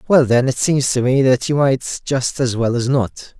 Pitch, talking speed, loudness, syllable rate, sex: 130 Hz, 245 wpm, -17 LUFS, 4.4 syllables/s, male